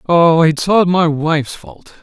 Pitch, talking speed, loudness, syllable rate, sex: 165 Hz, 205 wpm, -13 LUFS, 4.3 syllables/s, male